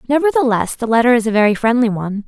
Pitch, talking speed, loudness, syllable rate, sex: 235 Hz, 210 wpm, -15 LUFS, 7.2 syllables/s, female